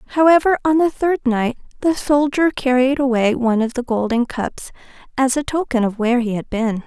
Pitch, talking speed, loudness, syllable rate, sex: 260 Hz, 190 wpm, -18 LUFS, 5.4 syllables/s, female